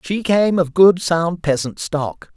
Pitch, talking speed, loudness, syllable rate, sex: 170 Hz, 180 wpm, -17 LUFS, 3.6 syllables/s, male